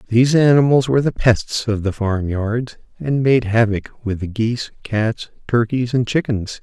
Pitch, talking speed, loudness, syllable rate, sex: 115 Hz, 170 wpm, -18 LUFS, 4.6 syllables/s, male